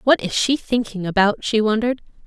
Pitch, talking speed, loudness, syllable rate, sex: 220 Hz, 185 wpm, -19 LUFS, 5.8 syllables/s, female